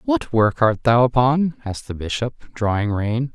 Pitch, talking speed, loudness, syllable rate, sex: 115 Hz, 180 wpm, -20 LUFS, 4.7 syllables/s, male